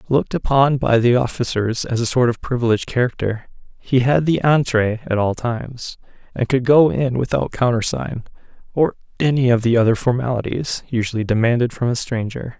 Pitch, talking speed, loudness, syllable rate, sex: 120 Hz, 165 wpm, -18 LUFS, 5.4 syllables/s, male